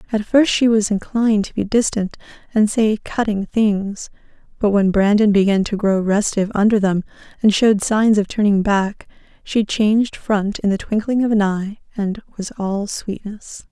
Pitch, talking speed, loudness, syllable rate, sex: 210 Hz, 175 wpm, -18 LUFS, 4.7 syllables/s, female